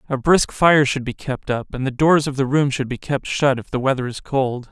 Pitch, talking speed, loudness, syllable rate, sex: 135 Hz, 280 wpm, -19 LUFS, 5.2 syllables/s, male